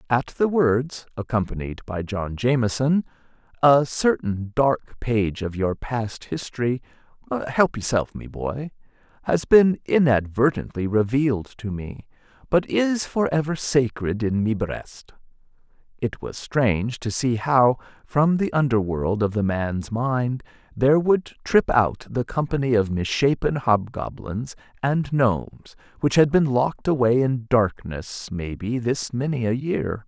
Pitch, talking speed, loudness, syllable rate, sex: 125 Hz, 130 wpm, -23 LUFS, 4.0 syllables/s, male